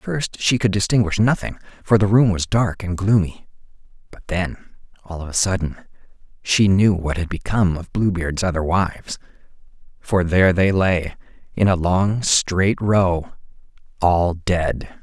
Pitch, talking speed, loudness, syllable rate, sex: 95 Hz, 155 wpm, -19 LUFS, 4.4 syllables/s, male